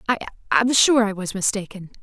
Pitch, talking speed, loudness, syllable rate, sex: 215 Hz, 150 wpm, -20 LUFS, 5.6 syllables/s, female